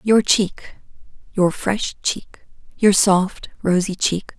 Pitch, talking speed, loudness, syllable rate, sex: 195 Hz, 110 wpm, -19 LUFS, 3.1 syllables/s, female